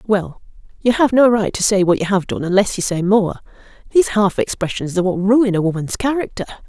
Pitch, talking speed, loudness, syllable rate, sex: 205 Hz, 215 wpm, -17 LUFS, 5.9 syllables/s, female